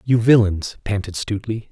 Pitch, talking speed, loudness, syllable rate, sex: 105 Hz, 140 wpm, -19 LUFS, 5.3 syllables/s, male